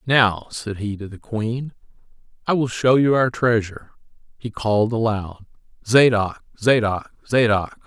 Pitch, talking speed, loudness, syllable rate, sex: 115 Hz, 135 wpm, -20 LUFS, 4.3 syllables/s, male